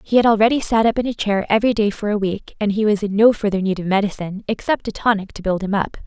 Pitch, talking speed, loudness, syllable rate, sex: 210 Hz, 275 wpm, -19 LUFS, 6.7 syllables/s, female